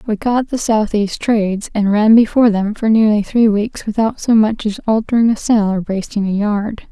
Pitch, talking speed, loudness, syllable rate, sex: 215 Hz, 210 wpm, -15 LUFS, 4.9 syllables/s, female